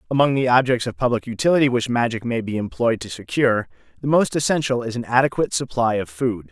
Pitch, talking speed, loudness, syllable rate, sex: 120 Hz, 200 wpm, -20 LUFS, 6.4 syllables/s, male